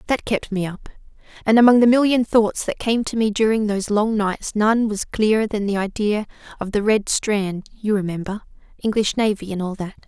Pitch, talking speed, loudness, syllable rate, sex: 210 Hz, 195 wpm, -20 LUFS, 5.1 syllables/s, female